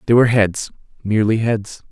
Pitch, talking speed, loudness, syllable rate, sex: 110 Hz, 125 wpm, -17 LUFS, 5.8 syllables/s, male